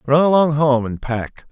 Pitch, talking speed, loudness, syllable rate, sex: 140 Hz, 200 wpm, -17 LUFS, 4.4 syllables/s, male